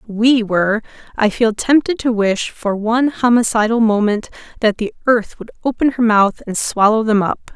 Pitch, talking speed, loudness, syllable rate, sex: 225 Hz, 175 wpm, -16 LUFS, 4.8 syllables/s, female